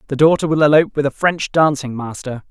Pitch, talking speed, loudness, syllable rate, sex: 145 Hz, 215 wpm, -16 LUFS, 6.2 syllables/s, male